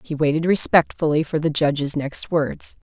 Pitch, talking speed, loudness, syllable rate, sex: 155 Hz, 165 wpm, -19 LUFS, 4.8 syllables/s, female